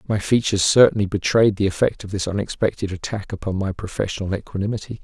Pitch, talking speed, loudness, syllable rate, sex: 100 Hz, 165 wpm, -21 LUFS, 6.6 syllables/s, male